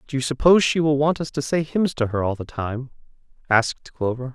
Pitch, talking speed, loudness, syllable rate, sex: 135 Hz, 235 wpm, -21 LUFS, 5.8 syllables/s, male